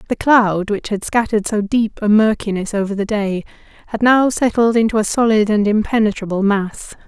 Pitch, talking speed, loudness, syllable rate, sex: 215 Hz, 180 wpm, -16 LUFS, 5.3 syllables/s, female